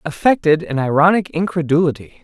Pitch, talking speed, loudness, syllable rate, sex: 165 Hz, 105 wpm, -16 LUFS, 5.6 syllables/s, male